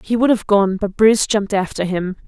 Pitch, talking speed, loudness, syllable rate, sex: 205 Hz, 235 wpm, -17 LUFS, 5.8 syllables/s, female